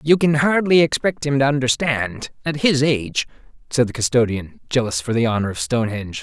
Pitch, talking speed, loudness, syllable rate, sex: 130 Hz, 175 wpm, -19 LUFS, 5.6 syllables/s, male